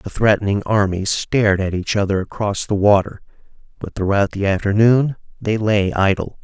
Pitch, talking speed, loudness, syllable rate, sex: 105 Hz, 160 wpm, -18 LUFS, 5.1 syllables/s, male